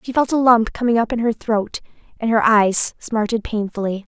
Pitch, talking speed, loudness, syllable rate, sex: 225 Hz, 205 wpm, -18 LUFS, 5.1 syllables/s, female